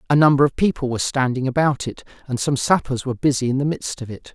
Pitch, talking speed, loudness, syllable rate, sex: 135 Hz, 250 wpm, -20 LUFS, 6.6 syllables/s, male